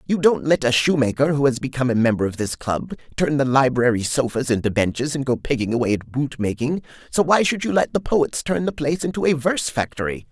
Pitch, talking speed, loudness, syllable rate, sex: 135 Hz, 235 wpm, -21 LUFS, 6.0 syllables/s, male